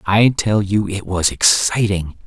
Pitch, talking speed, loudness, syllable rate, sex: 100 Hz, 160 wpm, -16 LUFS, 3.8 syllables/s, male